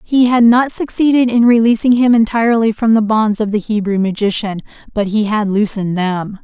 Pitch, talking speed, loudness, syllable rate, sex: 220 Hz, 185 wpm, -13 LUFS, 5.3 syllables/s, female